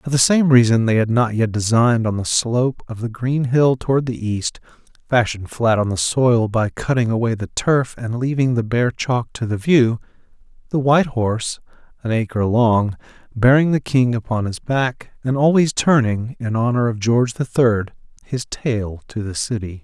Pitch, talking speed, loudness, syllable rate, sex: 120 Hz, 190 wpm, -18 LUFS, 4.8 syllables/s, male